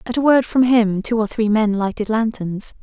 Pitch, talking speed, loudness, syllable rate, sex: 220 Hz, 235 wpm, -18 LUFS, 4.9 syllables/s, female